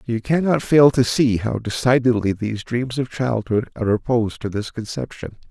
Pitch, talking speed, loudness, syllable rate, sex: 120 Hz, 175 wpm, -20 LUFS, 5.2 syllables/s, male